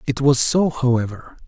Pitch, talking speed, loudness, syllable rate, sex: 130 Hz, 165 wpm, -18 LUFS, 4.7 syllables/s, male